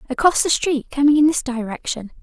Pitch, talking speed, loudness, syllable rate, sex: 270 Hz, 190 wpm, -18 LUFS, 5.8 syllables/s, female